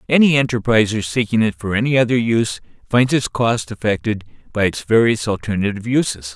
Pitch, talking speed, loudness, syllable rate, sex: 110 Hz, 160 wpm, -18 LUFS, 5.8 syllables/s, male